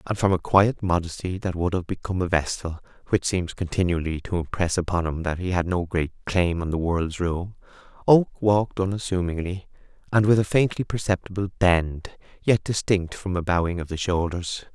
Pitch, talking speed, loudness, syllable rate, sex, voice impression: 90 Hz, 185 wpm, -24 LUFS, 5.3 syllables/s, male, very masculine, very adult-like, slightly middle-aged, thick, relaxed, very weak, dark, very soft, muffled, slightly halting, slightly raspy, cool, very intellectual, slightly refreshing, very sincere, very calm, friendly, reassuring, slightly unique, elegant, slightly wild, sweet, slightly lively, very kind, very modest, slightly light